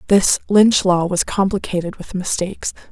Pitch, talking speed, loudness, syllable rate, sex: 190 Hz, 145 wpm, -17 LUFS, 4.8 syllables/s, female